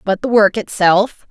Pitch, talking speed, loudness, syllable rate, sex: 205 Hz, 185 wpm, -14 LUFS, 4.2 syllables/s, female